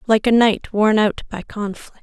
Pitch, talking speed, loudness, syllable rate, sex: 215 Hz, 205 wpm, -18 LUFS, 4.6 syllables/s, female